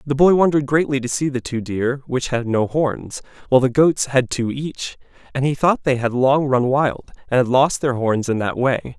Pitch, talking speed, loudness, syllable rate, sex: 135 Hz, 235 wpm, -19 LUFS, 4.9 syllables/s, male